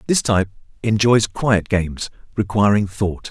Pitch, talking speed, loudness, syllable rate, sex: 105 Hz, 125 wpm, -19 LUFS, 4.7 syllables/s, male